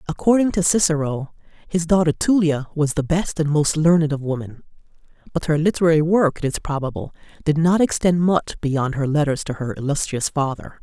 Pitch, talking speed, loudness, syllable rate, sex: 155 Hz, 175 wpm, -20 LUFS, 5.5 syllables/s, female